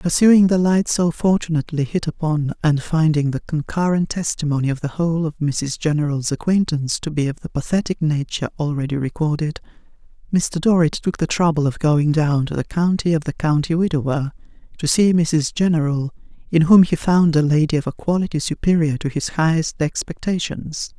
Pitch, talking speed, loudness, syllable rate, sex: 160 Hz, 170 wpm, -19 LUFS, 5.4 syllables/s, female